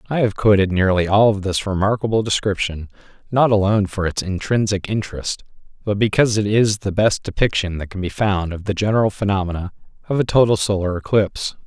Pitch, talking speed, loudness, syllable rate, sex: 100 Hz, 180 wpm, -19 LUFS, 6.0 syllables/s, male